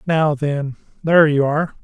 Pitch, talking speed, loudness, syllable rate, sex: 150 Hz, 130 wpm, -17 LUFS, 5.0 syllables/s, male